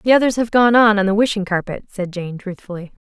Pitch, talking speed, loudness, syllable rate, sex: 205 Hz, 235 wpm, -16 LUFS, 5.9 syllables/s, female